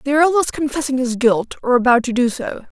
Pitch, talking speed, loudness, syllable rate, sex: 260 Hz, 235 wpm, -17 LUFS, 5.6 syllables/s, female